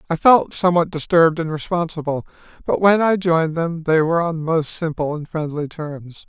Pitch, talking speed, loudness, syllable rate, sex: 160 Hz, 180 wpm, -19 LUFS, 5.3 syllables/s, male